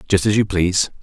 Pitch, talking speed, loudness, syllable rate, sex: 95 Hz, 235 wpm, -18 LUFS, 6.4 syllables/s, male